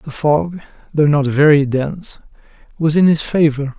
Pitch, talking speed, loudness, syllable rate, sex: 150 Hz, 160 wpm, -15 LUFS, 4.7 syllables/s, male